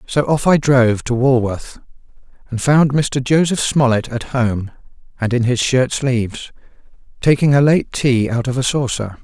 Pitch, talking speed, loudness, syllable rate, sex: 130 Hz, 160 wpm, -16 LUFS, 4.6 syllables/s, male